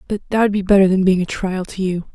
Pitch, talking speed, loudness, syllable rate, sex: 190 Hz, 310 wpm, -17 LUFS, 6.5 syllables/s, female